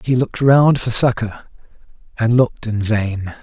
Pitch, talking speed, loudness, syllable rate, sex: 115 Hz, 160 wpm, -16 LUFS, 4.6 syllables/s, male